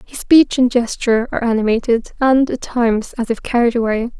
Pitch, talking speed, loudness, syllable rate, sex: 240 Hz, 185 wpm, -16 LUFS, 5.7 syllables/s, female